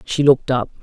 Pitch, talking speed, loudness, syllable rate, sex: 130 Hz, 220 wpm, -17 LUFS, 6.4 syllables/s, female